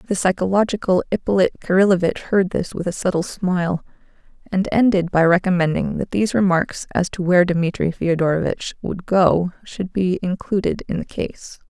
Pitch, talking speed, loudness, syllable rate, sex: 185 Hz, 155 wpm, -19 LUFS, 5.1 syllables/s, female